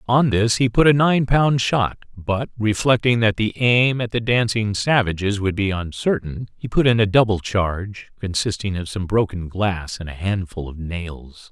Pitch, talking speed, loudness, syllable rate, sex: 105 Hz, 190 wpm, -20 LUFS, 4.5 syllables/s, male